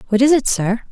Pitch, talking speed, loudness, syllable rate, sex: 240 Hz, 265 wpm, -16 LUFS, 6.1 syllables/s, female